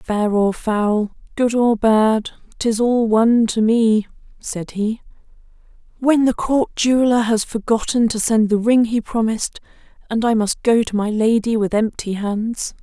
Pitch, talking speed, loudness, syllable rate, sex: 225 Hz, 165 wpm, -18 LUFS, 4.2 syllables/s, female